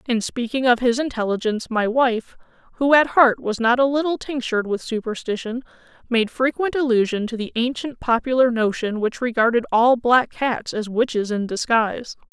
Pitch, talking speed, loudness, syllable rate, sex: 240 Hz, 165 wpm, -20 LUFS, 5.2 syllables/s, female